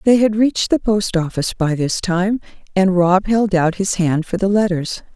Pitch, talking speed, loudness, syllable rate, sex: 190 Hz, 210 wpm, -17 LUFS, 4.8 syllables/s, female